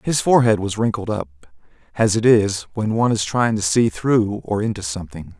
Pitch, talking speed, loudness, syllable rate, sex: 105 Hz, 200 wpm, -19 LUFS, 5.2 syllables/s, male